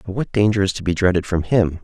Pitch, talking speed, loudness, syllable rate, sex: 95 Hz, 295 wpm, -19 LUFS, 6.4 syllables/s, male